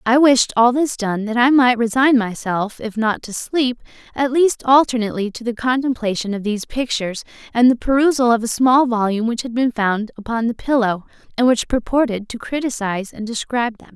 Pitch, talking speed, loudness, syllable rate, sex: 235 Hz, 195 wpm, -18 LUFS, 5.5 syllables/s, female